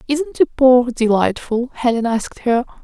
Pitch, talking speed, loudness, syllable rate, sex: 250 Hz, 125 wpm, -17 LUFS, 5.0 syllables/s, female